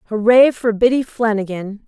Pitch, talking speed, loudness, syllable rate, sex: 225 Hz, 130 wpm, -15 LUFS, 5.0 syllables/s, female